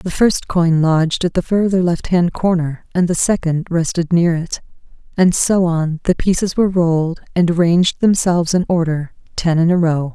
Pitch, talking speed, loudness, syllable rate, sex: 170 Hz, 190 wpm, -16 LUFS, 4.9 syllables/s, female